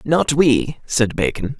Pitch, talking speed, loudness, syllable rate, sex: 130 Hz, 150 wpm, -18 LUFS, 3.5 syllables/s, male